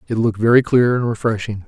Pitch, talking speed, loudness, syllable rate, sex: 115 Hz, 215 wpm, -17 LUFS, 6.6 syllables/s, male